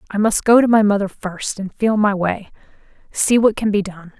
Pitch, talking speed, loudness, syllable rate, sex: 205 Hz, 215 wpm, -17 LUFS, 5.1 syllables/s, female